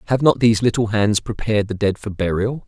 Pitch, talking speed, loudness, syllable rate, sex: 110 Hz, 225 wpm, -19 LUFS, 6.1 syllables/s, male